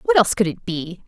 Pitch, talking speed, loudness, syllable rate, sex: 200 Hz, 280 wpm, -20 LUFS, 6.2 syllables/s, female